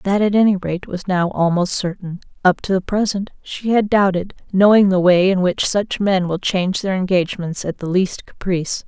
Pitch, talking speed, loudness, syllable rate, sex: 190 Hz, 205 wpm, -18 LUFS, 5.1 syllables/s, female